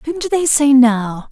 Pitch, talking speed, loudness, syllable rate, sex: 270 Hz, 230 wpm, -13 LUFS, 4.2 syllables/s, female